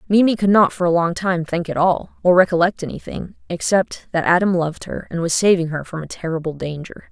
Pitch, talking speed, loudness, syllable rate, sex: 175 Hz, 220 wpm, -19 LUFS, 5.8 syllables/s, female